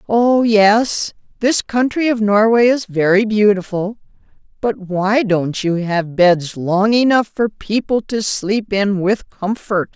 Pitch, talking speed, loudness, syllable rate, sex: 210 Hz, 145 wpm, -16 LUFS, 3.6 syllables/s, female